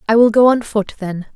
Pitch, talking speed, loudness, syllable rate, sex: 220 Hz, 265 wpm, -14 LUFS, 5.6 syllables/s, female